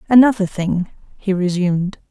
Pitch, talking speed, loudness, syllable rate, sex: 190 Hz, 115 wpm, -18 LUFS, 5.0 syllables/s, female